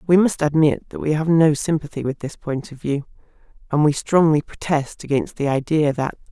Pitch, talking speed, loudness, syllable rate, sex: 150 Hz, 200 wpm, -20 LUFS, 5.2 syllables/s, female